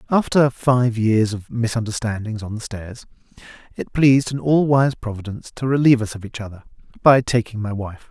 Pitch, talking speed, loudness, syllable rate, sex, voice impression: 115 Hz, 180 wpm, -19 LUFS, 5.4 syllables/s, male, masculine, adult-like, slightly soft, slightly sincere, slightly calm, friendly